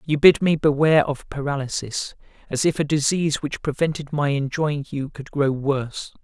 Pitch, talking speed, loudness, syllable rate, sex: 145 Hz, 175 wpm, -22 LUFS, 5.1 syllables/s, male